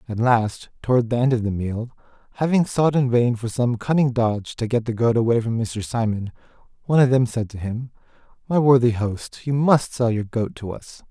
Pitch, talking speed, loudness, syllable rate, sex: 120 Hz, 215 wpm, -21 LUFS, 5.3 syllables/s, male